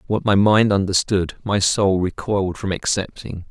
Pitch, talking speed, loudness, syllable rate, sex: 100 Hz, 155 wpm, -19 LUFS, 4.6 syllables/s, male